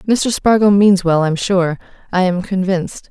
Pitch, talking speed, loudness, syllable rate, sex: 190 Hz, 175 wpm, -15 LUFS, 5.0 syllables/s, female